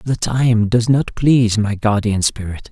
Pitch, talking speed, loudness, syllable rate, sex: 115 Hz, 175 wpm, -16 LUFS, 4.1 syllables/s, male